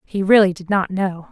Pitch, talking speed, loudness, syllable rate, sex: 190 Hz, 230 wpm, -17 LUFS, 5.0 syllables/s, female